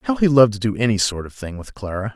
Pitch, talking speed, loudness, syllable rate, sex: 110 Hz, 305 wpm, -18 LUFS, 7.0 syllables/s, male